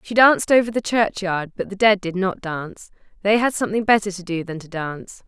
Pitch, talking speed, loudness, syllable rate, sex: 195 Hz, 215 wpm, -20 LUFS, 5.8 syllables/s, female